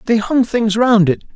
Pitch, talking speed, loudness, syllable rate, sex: 220 Hz, 220 wpm, -14 LUFS, 4.4 syllables/s, male